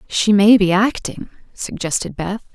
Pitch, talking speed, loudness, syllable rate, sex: 200 Hz, 140 wpm, -16 LUFS, 4.2 syllables/s, female